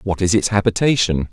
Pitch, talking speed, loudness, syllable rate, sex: 100 Hz, 180 wpm, -17 LUFS, 5.8 syllables/s, male